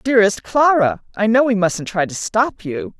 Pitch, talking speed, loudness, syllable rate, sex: 215 Hz, 180 wpm, -17 LUFS, 4.6 syllables/s, female